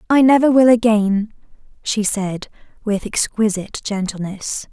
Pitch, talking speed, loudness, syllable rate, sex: 215 Hz, 115 wpm, -17 LUFS, 4.4 syllables/s, female